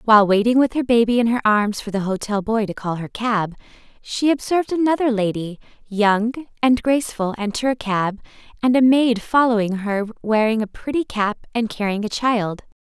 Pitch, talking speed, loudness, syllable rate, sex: 225 Hz, 180 wpm, -20 LUFS, 5.2 syllables/s, female